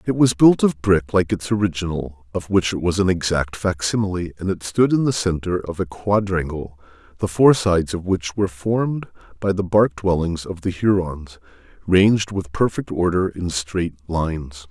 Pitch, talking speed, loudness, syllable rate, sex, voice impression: 90 Hz, 185 wpm, -20 LUFS, 4.9 syllables/s, male, very masculine, slightly middle-aged, thick, cool, sincere, calm, slightly mature, wild